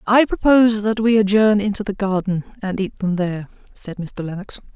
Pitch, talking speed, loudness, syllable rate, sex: 200 Hz, 190 wpm, -18 LUFS, 5.4 syllables/s, female